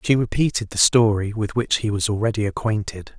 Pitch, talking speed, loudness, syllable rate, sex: 110 Hz, 190 wpm, -20 LUFS, 5.5 syllables/s, male